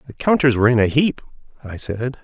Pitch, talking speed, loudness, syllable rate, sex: 125 Hz, 215 wpm, -18 LUFS, 6.2 syllables/s, male